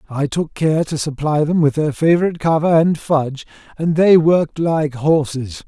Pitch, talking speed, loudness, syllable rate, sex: 155 Hz, 180 wpm, -16 LUFS, 4.9 syllables/s, male